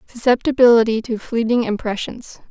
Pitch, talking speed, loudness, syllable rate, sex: 230 Hz, 95 wpm, -17 LUFS, 5.2 syllables/s, female